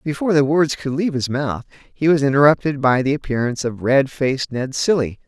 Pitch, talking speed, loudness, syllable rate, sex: 140 Hz, 205 wpm, -18 LUFS, 5.9 syllables/s, male